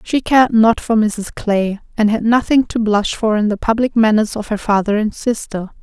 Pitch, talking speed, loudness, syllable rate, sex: 220 Hz, 215 wpm, -16 LUFS, 5.0 syllables/s, female